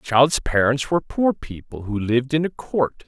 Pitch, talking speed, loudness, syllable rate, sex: 135 Hz, 195 wpm, -21 LUFS, 4.6 syllables/s, male